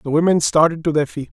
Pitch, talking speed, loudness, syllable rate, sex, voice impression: 155 Hz, 260 wpm, -17 LUFS, 6.5 syllables/s, male, masculine, adult-like, slightly muffled, slightly sincere, slightly unique